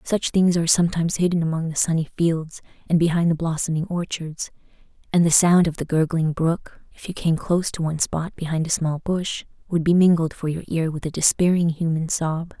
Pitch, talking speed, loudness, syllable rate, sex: 165 Hz, 205 wpm, -21 LUFS, 5.6 syllables/s, female